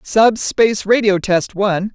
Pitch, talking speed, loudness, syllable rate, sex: 205 Hz, 125 wpm, -15 LUFS, 4.3 syllables/s, female